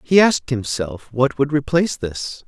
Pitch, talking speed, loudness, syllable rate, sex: 140 Hz, 170 wpm, -19 LUFS, 4.6 syllables/s, male